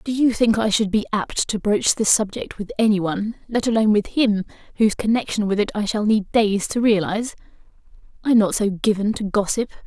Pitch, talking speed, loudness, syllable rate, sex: 215 Hz, 205 wpm, -20 LUFS, 5.7 syllables/s, female